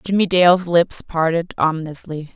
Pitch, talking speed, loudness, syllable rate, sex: 170 Hz, 130 wpm, -17 LUFS, 5.0 syllables/s, female